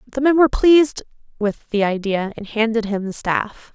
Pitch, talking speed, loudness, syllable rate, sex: 230 Hz, 190 wpm, -18 LUFS, 4.9 syllables/s, female